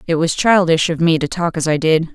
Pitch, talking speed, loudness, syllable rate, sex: 165 Hz, 280 wpm, -16 LUFS, 5.6 syllables/s, female